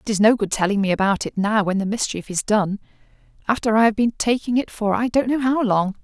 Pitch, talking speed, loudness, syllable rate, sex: 215 Hz, 250 wpm, -20 LUFS, 5.9 syllables/s, female